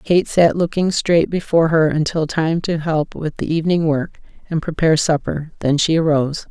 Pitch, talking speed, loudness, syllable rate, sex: 160 Hz, 185 wpm, -18 LUFS, 5.1 syllables/s, female